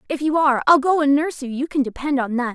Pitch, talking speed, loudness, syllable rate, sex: 280 Hz, 305 wpm, -19 LUFS, 6.9 syllables/s, female